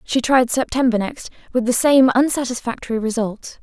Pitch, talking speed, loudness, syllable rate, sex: 245 Hz, 130 wpm, -18 LUFS, 5.2 syllables/s, female